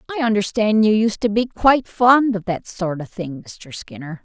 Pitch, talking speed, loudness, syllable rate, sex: 215 Hz, 210 wpm, -18 LUFS, 4.8 syllables/s, female